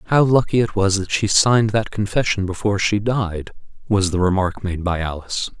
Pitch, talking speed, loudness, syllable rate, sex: 100 Hz, 195 wpm, -19 LUFS, 5.3 syllables/s, male